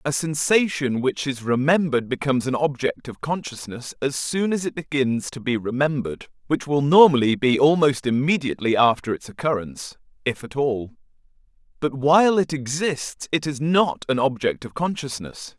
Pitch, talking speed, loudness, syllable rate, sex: 140 Hz, 160 wpm, -22 LUFS, 5.1 syllables/s, male